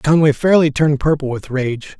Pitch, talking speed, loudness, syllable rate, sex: 145 Hz, 180 wpm, -16 LUFS, 5.1 syllables/s, male